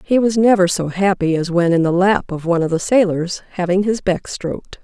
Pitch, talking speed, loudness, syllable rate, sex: 185 Hz, 235 wpm, -17 LUFS, 5.4 syllables/s, female